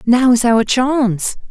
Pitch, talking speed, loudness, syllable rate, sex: 240 Hz, 120 wpm, -14 LUFS, 3.1 syllables/s, female